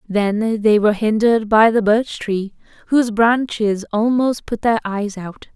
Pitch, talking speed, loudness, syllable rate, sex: 220 Hz, 160 wpm, -17 LUFS, 4.3 syllables/s, female